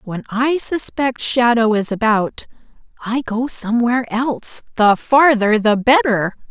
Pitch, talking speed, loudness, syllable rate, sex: 235 Hz, 130 wpm, -16 LUFS, 4.2 syllables/s, female